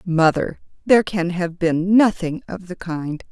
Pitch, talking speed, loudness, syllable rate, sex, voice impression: 180 Hz, 165 wpm, -19 LUFS, 4.2 syllables/s, female, very feminine, very adult-like, slightly clear, slightly intellectual, slightly elegant